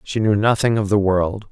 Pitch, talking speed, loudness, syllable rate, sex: 105 Hz, 235 wpm, -18 LUFS, 5.1 syllables/s, male